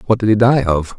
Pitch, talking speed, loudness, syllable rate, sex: 105 Hz, 305 wpm, -14 LUFS, 6.1 syllables/s, male